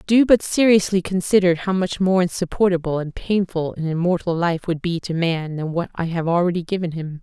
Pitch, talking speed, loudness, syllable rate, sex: 175 Hz, 200 wpm, -20 LUFS, 5.4 syllables/s, female